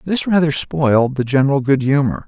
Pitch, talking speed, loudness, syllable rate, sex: 140 Hz, 185 wpm, -16 LUFS, 5.5 syllables/s, male